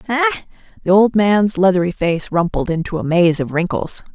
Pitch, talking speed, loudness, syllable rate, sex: 190 Hz, 175 wpm, -16 LUFS, 5.1 syllables/s, female